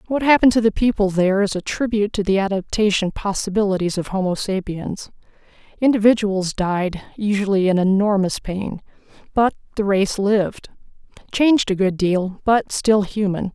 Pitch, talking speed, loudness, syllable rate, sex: 200 Hz, 145 wpm, -19 LUFS, 5.2 syllables/s, female